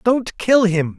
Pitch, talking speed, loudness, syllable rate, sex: 205 Hz, 180 wpm, -17 LUFS, 3.4 syllables/s, male